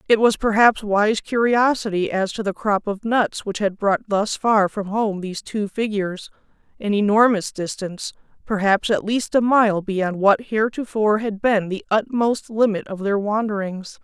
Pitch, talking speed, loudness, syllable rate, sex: 210 Hz, 165 wpm, -20 LUFS, 4.7 syllables/s, female